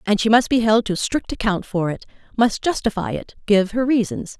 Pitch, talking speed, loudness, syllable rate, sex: 215 Hz, 220 wpm, -20 LUFS, 5.2 syllables/s, female